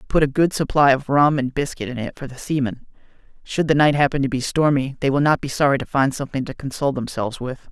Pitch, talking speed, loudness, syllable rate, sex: 140 Hz, 250 wpm, -20 LUFS, 6.4 syllables/s, male